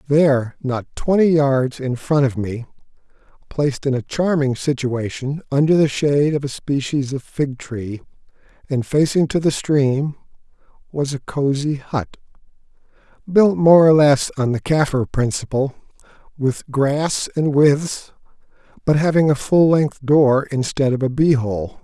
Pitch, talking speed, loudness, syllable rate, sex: 140 Hz, 150 wpm, -18 LUFS, 4.3 syllables/s, male